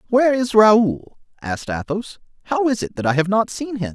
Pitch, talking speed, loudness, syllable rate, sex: 200 Hz, 215 wpm, -19 LUFS, 5.4 syllables/s, male